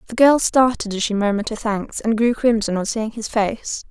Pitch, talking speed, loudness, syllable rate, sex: 220 Hz, 230 wpm, -19 LUFS, 5.2 syllables/s, female